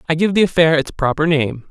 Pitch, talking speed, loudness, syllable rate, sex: 155 Hz, 245 wpm, -16 LUFS, 6.0 syllables/s, male